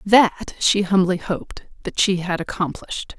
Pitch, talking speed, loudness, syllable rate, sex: 185 Hz, 150 wpm, -20 LUFS, 4.5 syllables/s, female